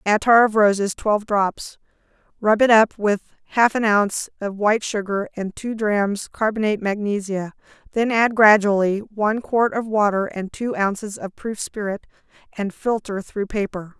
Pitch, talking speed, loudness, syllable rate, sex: 210 Hz, 160 wpm, -20 LUFS, 4.7 syllables/s, female